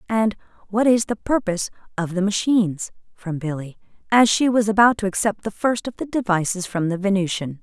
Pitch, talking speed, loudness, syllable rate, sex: 200 Hz, 190 wpm, -21 LUFS, 5.6 syllables/s, female